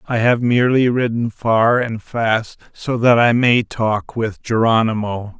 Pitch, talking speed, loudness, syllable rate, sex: 115 Hz, 155 wpm, -17 LUFS, 3.9 syllables/s, male